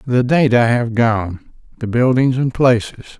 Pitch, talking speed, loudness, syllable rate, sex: 120 Hz, 150 wpm, -15 LUFS, 4.6 syllables/s, male